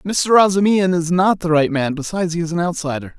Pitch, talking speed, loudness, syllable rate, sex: 170 Hz, 225 wpm, -17 LUFS, 6.0 syllables/s, male